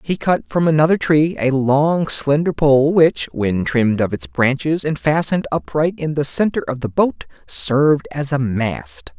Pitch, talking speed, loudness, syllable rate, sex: 135 Hz, 185 wpm, -17 LUFS, 4.4 syllables/s, male